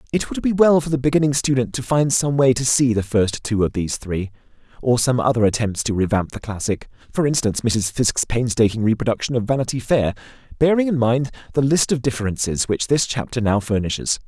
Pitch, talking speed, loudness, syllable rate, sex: 120 Hz, 205 wpm, -20 LUFS, 5.9 syllables/s, male